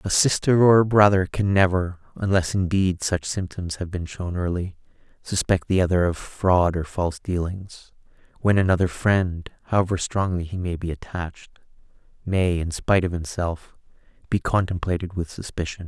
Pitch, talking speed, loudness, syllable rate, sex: 90 Hz, 155 wpm, -23 LUFS, 5.1 syllables/s, male